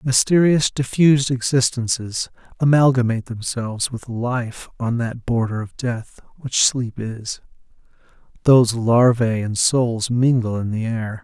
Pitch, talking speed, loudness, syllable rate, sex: 120 Hz, 125 wpm, -19 LUFS, 4.2 syllables/s, male